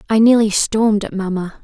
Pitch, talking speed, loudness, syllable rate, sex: 210 Hz, 185 wpm, -15 LUFS, 5.8 syllables/s, female